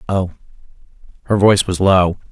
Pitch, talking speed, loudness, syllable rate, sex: 95 Hz, 130 wpm, -15 LUFS, 5.7 syllables/s, male